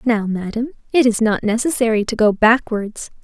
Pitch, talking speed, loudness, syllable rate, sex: 225 Hz, 165 wpm, -17 LUFS, 5.0 syllables/s, female